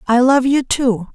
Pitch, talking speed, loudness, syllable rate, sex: 250 Hz, 210 wpm, -15 LUFS, 4.2 syllables/s, female